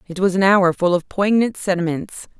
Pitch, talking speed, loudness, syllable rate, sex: 185 Hz, 200 wpm, -18 LUFS, 5.1 syllables/s, female